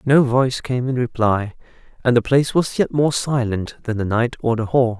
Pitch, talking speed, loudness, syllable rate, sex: 125 Hz, 215 wpm, -19 LUFS, 5.1 syllables/s, male